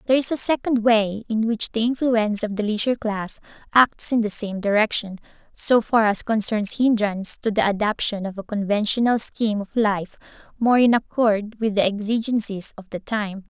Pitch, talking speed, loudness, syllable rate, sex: 215 Hz, 180 wpm, -21 LUFS, 5.1 syllables/s, female